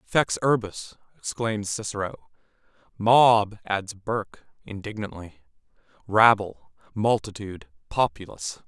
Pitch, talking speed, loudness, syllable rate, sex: 105 Hz, 75 wpm, -24 LUFS, 4.2 syllables/s, male